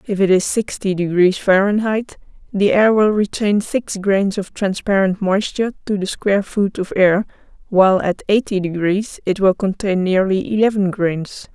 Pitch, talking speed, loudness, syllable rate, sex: 195 Hz, 160 wpm, -17 LUFS, 4.6 syllables/s, female